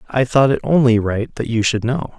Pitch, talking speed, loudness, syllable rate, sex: 120 Hz, 245 wpm, -17 LUFS, 5.2 syllables/s, male